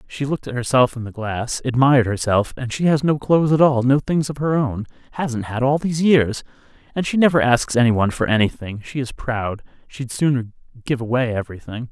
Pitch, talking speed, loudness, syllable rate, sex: 125 Hz, 205 wpm, -19 LUFS, 5.7 syllables/s, male